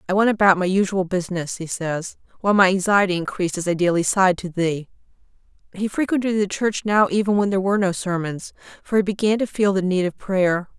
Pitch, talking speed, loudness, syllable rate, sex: 190 Hz, 210 wpm, -20 LUFS, 6.1 syllables/s, female